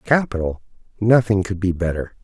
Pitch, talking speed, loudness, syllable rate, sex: 100 Hz, 135 wpm, -20 LUFS, 5.3 syllables/s, male